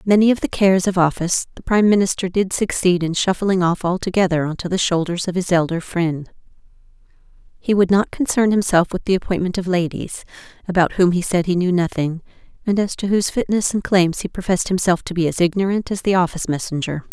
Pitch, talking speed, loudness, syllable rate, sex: 180 Hz, 205 wpm, -19 LUFS, 6.1 syllables/s, female